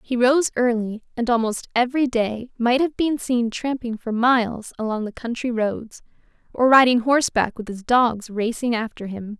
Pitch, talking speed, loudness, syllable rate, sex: 235 Hz, 175 wpm, -21 LUFS, 4.7 syllables/s, female